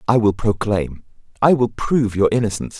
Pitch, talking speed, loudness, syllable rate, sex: 105 Hz, 170 wpm, -18 LUFS, 5.6 syllables/s, male